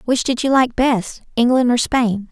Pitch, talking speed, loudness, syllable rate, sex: 245 Hz, 180 wpm, -17 LUFS, 4.4 syllables/s, female